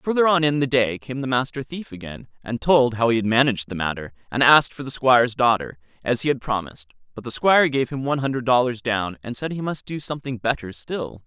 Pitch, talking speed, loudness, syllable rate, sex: 125 Hz, 240 wpm, -21 LUFS, 6.1 syllables/s, male